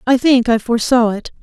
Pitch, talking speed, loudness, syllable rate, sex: 240 Hz, 210 wpm, -14 LUFS, 5.9 syllables/s, female